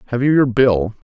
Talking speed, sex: 215 wpm, male